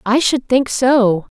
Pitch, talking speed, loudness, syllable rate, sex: 245 Hz, 170 wpm, -15 LUFS, 3.3 syllables/s, female